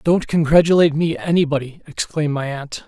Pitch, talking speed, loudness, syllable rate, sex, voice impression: 155 Hz, 145 wpm, -18 LUFS, 5.9 syllables/s, male, masculine, middle-aged, slightly relaxed, powerful, slightly bright, soft, raspy, cool, friendly, reassuring, wild, lively, slightly kind